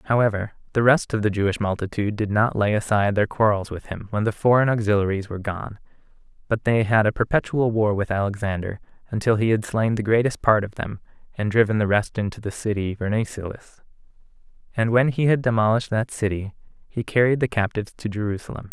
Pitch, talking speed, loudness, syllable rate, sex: 110 Hz, 190 wpm, -22 LUFS, 6.3 syllables/s, male